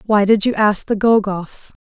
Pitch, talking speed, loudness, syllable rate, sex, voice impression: 205 Hz, 195 wpm, -16 LUFS, 4.4 syllables/s, female, feminine, adult-like, slightly calm, elegant